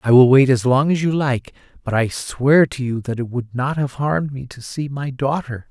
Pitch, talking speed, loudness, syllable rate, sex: 130 Hz, 250 wpm, -18 LUFS, 4.9 syllables/s, male